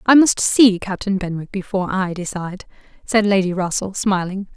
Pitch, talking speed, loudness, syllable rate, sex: 195 Hz, 160 wpm, -18 LUFS, 5.2 syllables/s, female